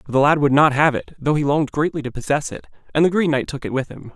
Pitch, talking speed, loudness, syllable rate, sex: 145 Hz, 315 wpm, -19 LUFS, 6.7 syllables/s, male